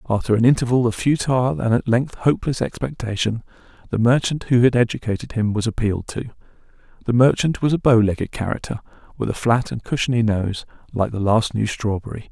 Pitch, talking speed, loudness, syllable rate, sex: 115 Hz, 180 wpm, -20 LUFS, 6.0 syllables/s, male